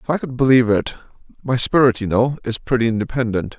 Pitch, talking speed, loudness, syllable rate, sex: 120 Hz, 185 wpm, -18 LUFS, 6.4 syllables/s, male